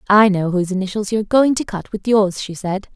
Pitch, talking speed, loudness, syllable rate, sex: 200 Hz, 265 wpm, -18 LUFS, 6.3 syllables/s, female